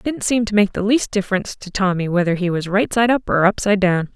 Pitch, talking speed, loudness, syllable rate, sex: 200 Hz, 275 wpm, -18 LUFS, 6.4 syllables/s, female